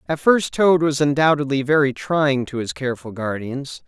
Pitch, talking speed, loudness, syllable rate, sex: 140 Hz, 170 wpm, -19 LUFS, 4.8 syllables/s, male